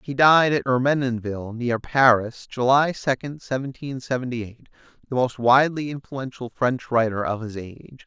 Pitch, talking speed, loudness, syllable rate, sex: 125 Hz, 150 wpm, -22 LUFS, 5.0 syllables/s, male